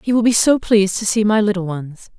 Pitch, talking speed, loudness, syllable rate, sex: 205 Hz, 275 wpm, -16 LUFS, 5.9 syllables/s, female